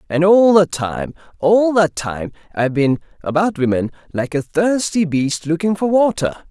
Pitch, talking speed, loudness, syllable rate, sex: 170 Hz, 150 wpm, -17 LUFS, 4.6 syllables/s, male